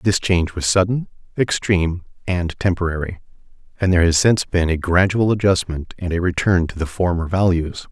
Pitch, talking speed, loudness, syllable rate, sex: 90 Hz, 165 wpm, -19 LUFS, 5.6 syllables/s, male